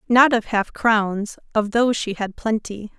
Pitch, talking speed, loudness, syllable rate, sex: 220 Hz, 180 wpm, -20 LUFS, 4.3 syllables/s, female